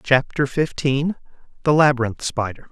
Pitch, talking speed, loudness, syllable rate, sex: 135 Hz, 110 wpm, -20 LUFS, 4.7 syllables/s, male